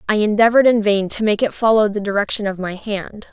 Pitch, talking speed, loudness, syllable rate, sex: 210 Hz, 235 wpm, -17 LUFS, 6.1 syllables/s, female